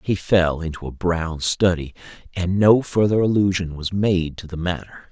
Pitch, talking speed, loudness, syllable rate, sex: 90 Hz, 175 wpm, -20 LUFS, 4.5 syllables/s, male